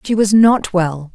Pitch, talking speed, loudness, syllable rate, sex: 195 Hz, 210 wpm, -14 LUFS, 3.8 syllables/s, female